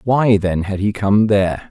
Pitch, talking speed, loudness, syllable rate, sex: 100 Hz, 210 wpm, -16 LUFS, 4.4 syllables/s, male